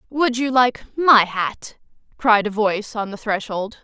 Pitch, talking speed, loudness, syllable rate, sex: 225 Hz, 170 wpm, -19 LUFS, 4.0 syllables/s, female